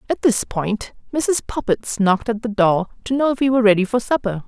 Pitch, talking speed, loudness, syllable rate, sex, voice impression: 230 Hz, 230 wpm, -19 LUFS, 5.7 syllables/s, female, feminine, middle-aged, slightly relaxed, powerful, bright, soft, muffled, slightly calm, friendly, reassuring, elegant, lively, kind